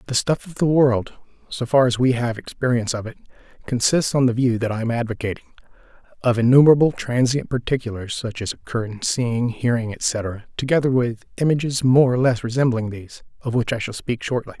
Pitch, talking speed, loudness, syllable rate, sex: 120 Hz, 190 wpm, -20 LUFS, 5.7 syllables/s, male